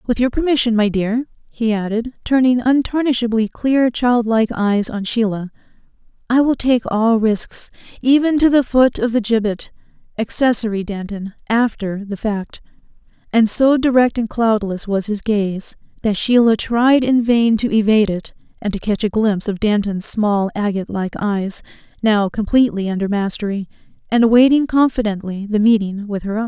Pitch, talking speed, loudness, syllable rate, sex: 225 Hz, 155 wpm, -17 LUFS, 4.9 syllables/s, female